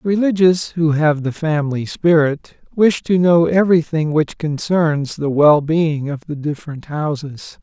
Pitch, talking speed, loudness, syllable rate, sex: 155 Hz, 140 wpm, -16 LUFS, 4.3 syllables/s, male